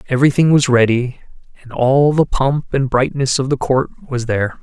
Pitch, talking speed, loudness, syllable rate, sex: 130 Hz, 180 wpm, -16 LUFS, 5.0 syllables/s, male